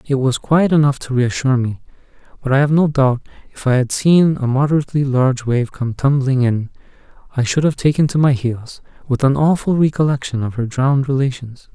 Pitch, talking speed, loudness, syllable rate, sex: 135 Hz, 195 wpm, -16 LUFS, 5.6 syllables/s, male